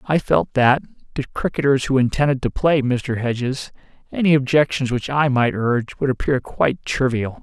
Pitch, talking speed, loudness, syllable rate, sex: 130 Hz, 170 wpm, -19 LUFS, 5.1 syllables/s, male